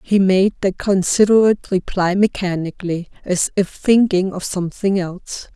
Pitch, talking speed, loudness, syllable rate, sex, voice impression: 190 Hz, 130 wpm, -17 LUFS, 5.0 syllables/s, female, very feminine, slightly middle-aged, thin, slightly powerful, slightly dark, slightly hard, slightly muffled, fluent, slightly raspy, slightly cute, intellectual, very refreshing, sincere, very calm, friendly, reassuring, unique, elegant, slightly wild, lively, kind